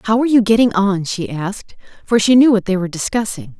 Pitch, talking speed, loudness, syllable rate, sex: 205 Hz, 235 wpm, -15 LUFS, 6.3 syllables/s, female